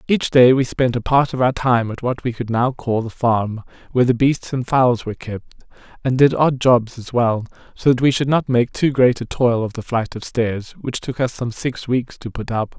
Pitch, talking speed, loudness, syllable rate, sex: 125 Hz, 255 wpm, -18 LUFS, 4.9 syllables/s, male